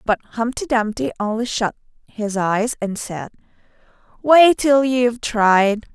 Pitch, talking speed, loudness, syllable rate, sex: 230 Hz, 130 wpm, -18 LUFS, 4.0 syllables/s, female